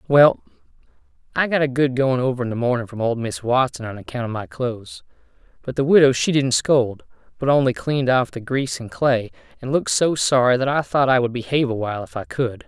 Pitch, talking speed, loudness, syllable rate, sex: 125 Hz, 225 wpm, -20 LUFS, 6.0 syllables/s, male